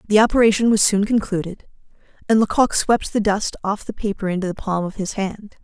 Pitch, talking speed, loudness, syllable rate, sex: 205 Hz, 200 wpm, -19 LUFS, 5.7 syllables/s, female